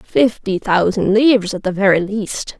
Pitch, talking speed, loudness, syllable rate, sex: 205 Hz, 160 wpm, -16 LUFS, 4.3 syllables/s, female